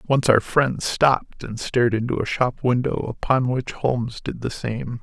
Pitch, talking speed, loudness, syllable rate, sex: 120 Hz, 190 wpm, -22 LUFS, 4.6 syllables/s, male